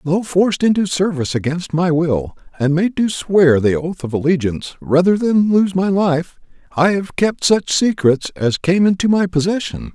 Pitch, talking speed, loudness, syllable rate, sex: 175 Hz, 180 wpm, -16 LUFS, 4.7 syllables/s, male